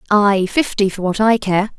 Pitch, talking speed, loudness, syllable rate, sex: 205 Hz, 200 wpm, -16 LUFS, 4.6 syllables/s, female